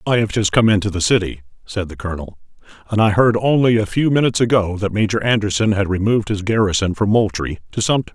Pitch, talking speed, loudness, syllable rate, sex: 105 Hz, 215 wpm, -17 LUFS, 6.4 syllables/s, male